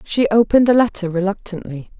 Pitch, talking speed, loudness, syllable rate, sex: 205 Hz, 150 wpm, -16 LUFS, 6.1 syllables/s, female